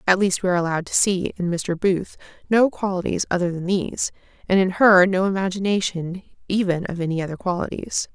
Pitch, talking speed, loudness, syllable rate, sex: 185 Hz, 185 wpm, -21 LUFS, 5.9 syllables/s, female